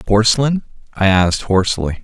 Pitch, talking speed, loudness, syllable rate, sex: 105 Hz, 120 wpm, -15 LUFS, 5.9 syllables/s, male